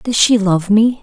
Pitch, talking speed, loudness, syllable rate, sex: 210 Hz, 235 wpm, -13 LUFS, 4.0 syllables/s, female